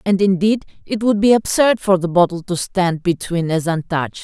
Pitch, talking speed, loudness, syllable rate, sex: 185 Hz, 200 wpm, -17 LUFS, 5.1 syllables/s, female